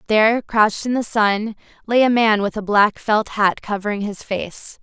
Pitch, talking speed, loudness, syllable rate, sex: 215 Hz, 200 wpm, -18 LUFS, 4.6 syllables/s, female